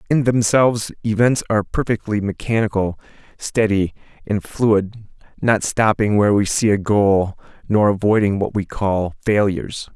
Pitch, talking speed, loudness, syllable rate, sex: 105 Hz, 135 wpm, -18 LUFS, 4.7 syllables/s, male